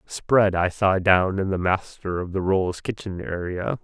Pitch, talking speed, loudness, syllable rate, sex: 95 Hz, 190 wpm, -23 LUFS, 4.0 syllables/s, male